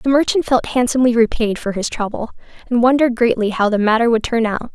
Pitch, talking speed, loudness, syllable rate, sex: 235 Hz, 215 wpm, -16 LUFS, 6.3 syllables/s, female